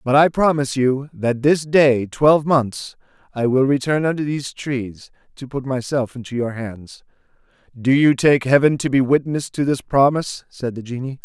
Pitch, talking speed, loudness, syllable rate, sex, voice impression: 135 Hz, 180 wpm, -18 LUFS, 4.8 syllables/s, male, masculine, adult-like, slightly thick, cool, sincere, reassuring